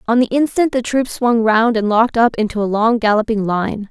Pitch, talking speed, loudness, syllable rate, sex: 225 Hz, 230 wpm, -16 LUFS, 5.4 syllables/s, female